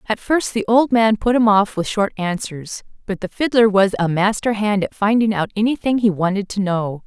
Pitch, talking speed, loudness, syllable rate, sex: 210 Hz, 220 wpm, -18 LUFS, 5.1 syllables/s, female